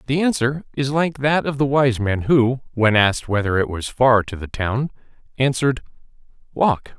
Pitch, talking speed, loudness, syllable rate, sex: 125 Hz, 180 wpm, -19 LUFS, 4.9 syllables/s, male